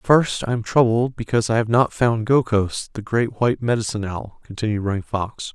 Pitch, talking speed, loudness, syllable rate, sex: 115 Hz, 195 wpm, -21 LUFS, 5.3 syllables/s, male